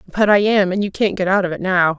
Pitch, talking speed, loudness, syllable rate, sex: 190 Hz, 335 wpm, -17 LUFS, 6.7 syllables/s, female